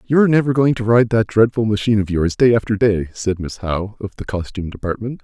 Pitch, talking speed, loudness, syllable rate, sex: 110 Hz, 230 wpm, -17 LUFS, 6.3 syllables/s, male